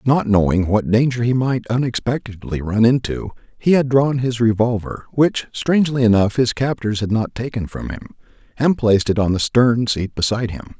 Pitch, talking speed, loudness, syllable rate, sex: 115 Hz, 185 wpm, -18 LUFS, 5.3 syllables/s, male